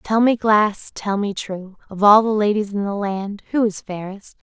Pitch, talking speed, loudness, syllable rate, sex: 205 Hz, 215 wpm, -19 LUFS, 4.4 syllables/s, female